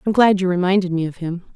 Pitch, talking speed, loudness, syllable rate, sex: 185 Hz, 270 wpm, -19 LUFS, 6.7 syllables/s, female